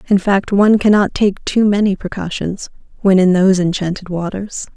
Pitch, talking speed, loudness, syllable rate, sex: 195 Hz, 165 wpm, -15 LUFS, 5.2 syllables/s, female